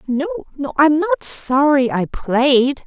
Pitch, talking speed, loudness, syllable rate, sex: 270 Hz, 145 wpm, -17 LUFS, 3.4 syllables/s, female